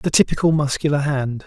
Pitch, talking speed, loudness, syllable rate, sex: 140 Hz, 165 wpm, -19 LUFS, 5.6 syllables/s, male